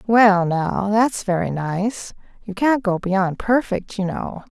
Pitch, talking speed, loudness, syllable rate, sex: 200 Hz, 160 wpm, -20 LUFS, 3.5 syllables/s, female